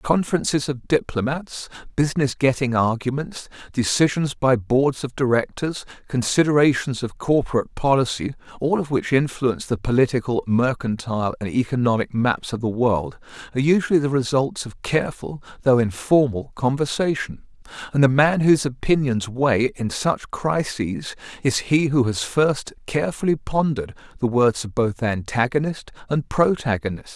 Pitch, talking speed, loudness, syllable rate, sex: 130 Hz, 135 wpm, -21 LUFS, 5.0 syllables/s, male